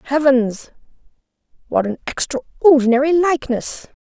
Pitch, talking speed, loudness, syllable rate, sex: 275 Hz, 75 wpm, -17 LUFS, 4.5 syllables/s, female